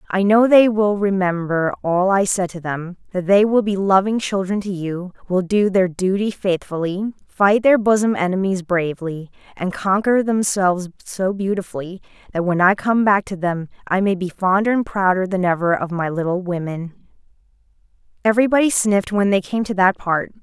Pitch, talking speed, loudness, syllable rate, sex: 190 Hz, 175 wpm, -18 LUFS, 5.0 syllables/s, female